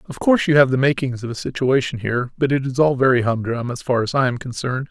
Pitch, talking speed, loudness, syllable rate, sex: 130 Hz, 270 wpm, -19 LUFS, 6.7 syllables/s, male